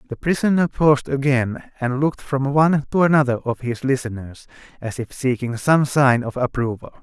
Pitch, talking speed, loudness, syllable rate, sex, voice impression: 135 Hz, 170 wpm, -20 LUFS, 5.3 syllables/s, male, masculine, adult-like, relaxed, powerful, soft, slightly clear, slightly refreshing, calm, friendly, reassuring, lively, kind